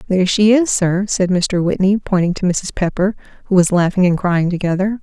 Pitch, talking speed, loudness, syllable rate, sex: 185 Hz, 205 wpm, -16 LUFS, 5.4 syllables/s, female